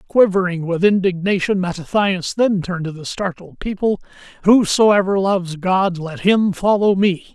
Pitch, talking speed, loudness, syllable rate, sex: 190 Hz, 140 wpm, -17 LUFS, 4.7 syllables/s, male